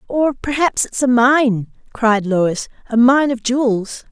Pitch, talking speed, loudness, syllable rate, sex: 245 Hz, 145 wpm, -16 LUFS, 3.8 syllables/s, female